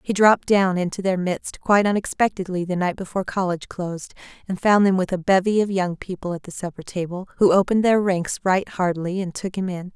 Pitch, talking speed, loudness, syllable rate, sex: 185 Hz, 215 wpm, -21 LUFS, 6.0 syllables/s, female